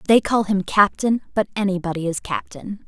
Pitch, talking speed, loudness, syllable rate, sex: 200 Hz, 165 wpm, -20 LUFS, 5.2 syllables/s, female